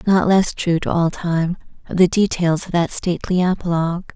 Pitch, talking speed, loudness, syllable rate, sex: 175 Hz, 190 wpm, -19 LUFS, 5.4 syllables/s, female